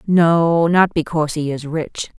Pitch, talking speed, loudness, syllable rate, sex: 160 Hz, 165 wpm, -17 LUFS, 4.0 syllables/s, female